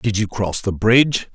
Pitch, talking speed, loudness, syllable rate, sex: 110 Hz, 225 wpm, -18 LUFS, 4.7 syllables/s, male